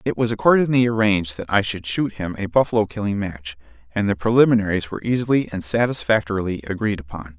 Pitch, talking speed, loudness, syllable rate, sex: 105 Hz, 180 wpm, -20 LUFS, 6.4 syllables/s, male